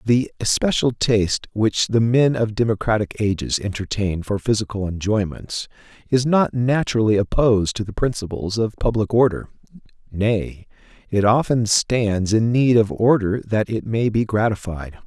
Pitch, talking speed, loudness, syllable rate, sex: 110 Hz, 145 wpm, -20 LUFS, 4.7 syllables/s, male